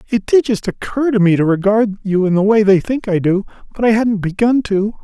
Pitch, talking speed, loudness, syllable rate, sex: 210 Hz, 250 wpm, -15 LUFS, 5.5 syllables/s, male